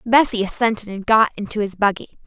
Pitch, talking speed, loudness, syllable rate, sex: 215 Hz, 185 wpm, -19 LUFS, 6.2 syllables/s, female